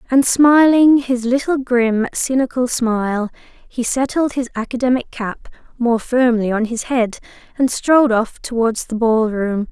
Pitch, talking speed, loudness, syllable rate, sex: 245 Hz, 140 wpm, -17 LUFS, 4.3 syllables/s, female